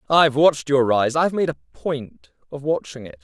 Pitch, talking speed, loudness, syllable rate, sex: 135 Hz, 185 wpm, -20 LUFS, 5.6 syllables/s, male